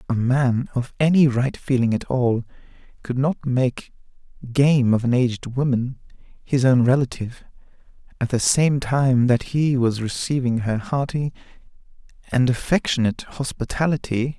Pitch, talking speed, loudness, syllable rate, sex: 130 Hz, 135 wpm, -21 LUFS, 4.7 syllables/s, male